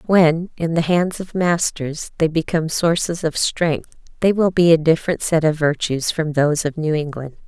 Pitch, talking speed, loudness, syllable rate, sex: 160 Hz, 195 wpm, -19 LUFS, 4.9 syllables/s, female